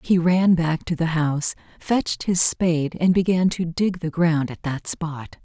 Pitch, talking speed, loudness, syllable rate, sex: 165 Hz, 200 wpm, -21 LUFS, 4.4 syllables/s, female